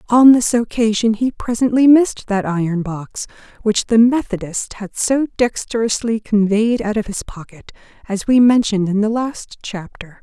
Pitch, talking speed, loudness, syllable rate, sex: 220 Hz, 160 wpm, -16 LUFS, 4.7 syllables/s, female